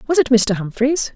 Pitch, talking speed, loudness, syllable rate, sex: 250 Hz, 210 wpm, -17 LUFS, 5.1 syllables/s, female